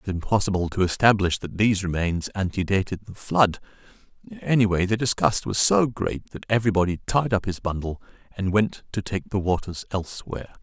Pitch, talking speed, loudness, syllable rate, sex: 100 Hz, 170 wpm, -24 LUFS, 5.6 syllables/s, male